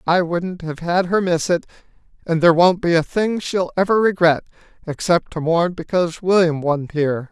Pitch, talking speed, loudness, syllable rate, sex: 170 Hz, 190 wpm, -18 LUFS, 5.1 syllables/s, male